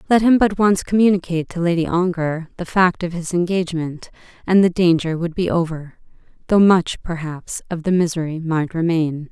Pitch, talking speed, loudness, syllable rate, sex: 175 Hz, 175 wpm, -19 LUFS, 5.2 syllables/s, female